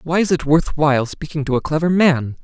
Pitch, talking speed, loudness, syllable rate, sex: 150 Hz, 245 wpm, -17 LUFS, 5.7 syllables/s, male